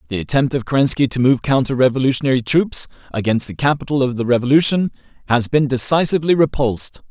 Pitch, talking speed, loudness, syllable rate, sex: 130 Hz, 160 wpm, -17 LUFS, 6.4 syllables/s, male